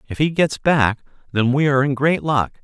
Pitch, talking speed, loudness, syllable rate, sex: 135 Hz, 230 wpm, -18 LUFS, 5.2 syllables/s, male